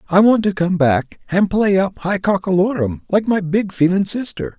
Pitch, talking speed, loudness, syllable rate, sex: 185 Hz, 195 wpm, -17 LUFS, 4.8 syllables/s, male